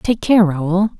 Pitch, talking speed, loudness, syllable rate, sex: 190 Hz, 180 wpm, -15 LUFS, 3.4 syllables/s, female